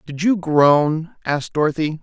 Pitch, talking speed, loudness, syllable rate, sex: 160 Hz, 150 wpm, -18 LUFS, 4.4 syllables/s, male